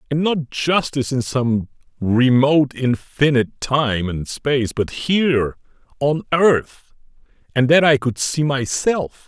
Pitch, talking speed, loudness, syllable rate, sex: 135 Hz, 130 wpm, -18 LUFS, 3.9 syllables/s, male